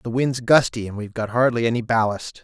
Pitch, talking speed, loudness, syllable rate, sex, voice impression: 115 Hz, 220 wpm, -21 LUFS, 6.0 syllables/s, male, masculine, adult-like, tensed, powerful, bright, clear, raspy, intellectual, friendly, reassuring, wild, lively